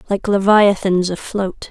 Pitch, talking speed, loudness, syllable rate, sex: 195 Hz, 105 wpm, -16 LUFS, 4.0 syllables/s, female